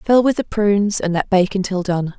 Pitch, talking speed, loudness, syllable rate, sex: 195 Hz, 245 wpm, -18 LUFS, 5.1 syllables/s, female